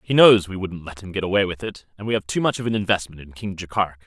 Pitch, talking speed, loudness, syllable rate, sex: 95 Hz, 295 wpm, -21 LUFS, 6.3 syllables/s, male